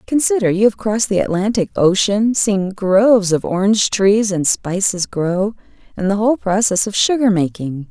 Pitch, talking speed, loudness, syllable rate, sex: 200 Hz, 165 wpm, -16 LUFS, 4.9 syllables/s, female